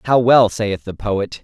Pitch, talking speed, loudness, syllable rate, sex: 105 Hz, 210 wpm, -16 LUFS, 3.9 syllables/s, male